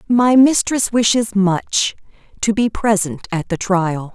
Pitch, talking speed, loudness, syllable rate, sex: 210 Hz, 145 wpm, -16 LUFS, 3.7 syllables/s, female